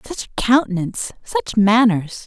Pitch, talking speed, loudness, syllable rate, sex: 225 Hz, 135 wpm, -18 LUFS, 5.0 syllables/s, female